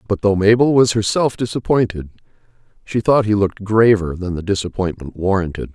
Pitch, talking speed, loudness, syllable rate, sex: 100 Hz, 155 wpm, -17 LUFS, 5.6 syllables/s, male